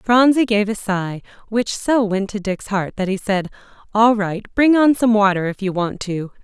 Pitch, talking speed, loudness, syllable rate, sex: 210 Hz, 215 wpm, -18 LUFS, 4.5 syllables/s, female